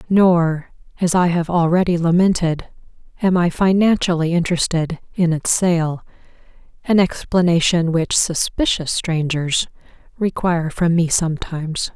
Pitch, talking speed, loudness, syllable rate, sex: 170 Hz, 110 wpm, -18 LUFS, 4.5 syllables/s, female